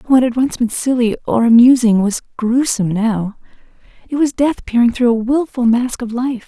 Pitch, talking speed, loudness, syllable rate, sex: 240 Hz, 185 wpm, -15 LUFS, 5.0 syllables/s, female